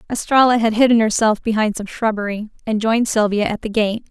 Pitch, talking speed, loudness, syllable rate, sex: 220 Hz, 190 wpm, -17 LUFS, 5.9 syllables/s, female